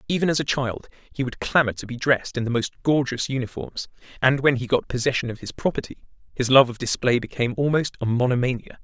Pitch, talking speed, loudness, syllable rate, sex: 125 Hz, 210 wpm, -23 LUFS, 6.2 syllables/s, male